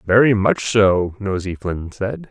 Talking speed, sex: 155 wpm, male